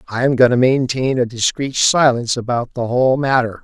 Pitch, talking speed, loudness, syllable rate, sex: 125 Hz, 200 wpm, -16 LUFS, 5.5 syllables/s, male